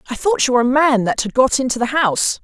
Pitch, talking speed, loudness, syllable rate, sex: 255 Hz, 295 wpm, -16 LUFS, 6.8 syllables/s, female